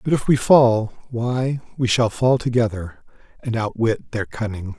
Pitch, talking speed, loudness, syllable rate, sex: 115 Hz, 165 wpm, -20 LUFS, 4.1 syllables/s, male